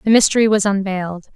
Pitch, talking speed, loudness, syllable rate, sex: 200 Hz, 175 wpm, -16 LUFS, 6.5 syllables/s, female